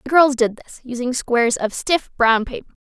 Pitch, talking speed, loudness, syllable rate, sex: 250 Hz, 210 wpm, -18 LUFS, 5.1 syllables/s, female